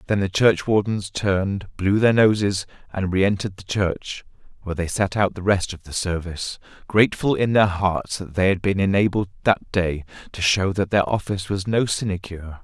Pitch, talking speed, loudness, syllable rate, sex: 95 Hz, 185 wpm, -21 LUFS, 5.3 syllables/s, male